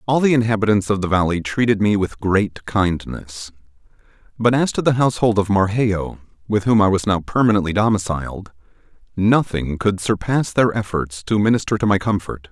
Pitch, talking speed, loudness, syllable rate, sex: 100 Hz, 170 wpm, -18 LUFS, 5.3 syllables/s, male